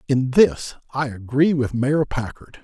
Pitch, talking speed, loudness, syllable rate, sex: 130 Hz, 160 wpm, -20 LUFS, 3.9 syllables/s, male